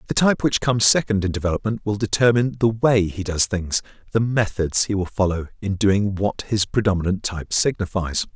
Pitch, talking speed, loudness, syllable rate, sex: 100 Hz, 180 wpm, -21 LUFS, 5.7 syllables/s, male